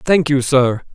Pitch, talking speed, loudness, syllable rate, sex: 135 Hz, 190 wpm, -15 LUFS, 3.8 syllables/s, male